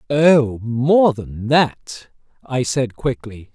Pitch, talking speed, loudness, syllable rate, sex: 125 Hz, 120 wpm, -17 LUFS, 2.7 syllables/s, male